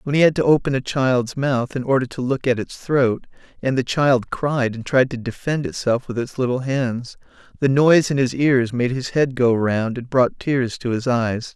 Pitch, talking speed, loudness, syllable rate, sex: 130 Hz, 230 wpm, -20 LUFS, 4.7 syllables/s, male